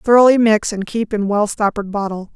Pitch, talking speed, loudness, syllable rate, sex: 210 Hz, 205 wpm, -16 LUFS, 5.6 syllables/s, female